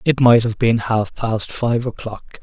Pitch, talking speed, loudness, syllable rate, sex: 115 Hz, 200 wpm, -18 LUFS, 3.9 syllables/s, male